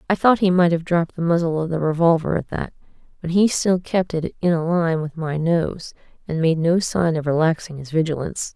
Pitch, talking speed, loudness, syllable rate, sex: 165 Hz, 225 wpm, -20 LUFS, 5.5 syllables/s, female